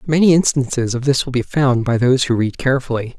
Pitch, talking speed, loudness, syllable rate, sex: 130 Hz, 225 wpm, -16 LUFS, 6.3 syllables/s, male